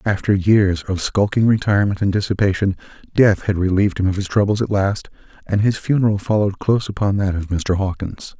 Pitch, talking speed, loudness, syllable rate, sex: 100 Hz, 185 wpm, -18 LUFS, 5.8 syllables/s, male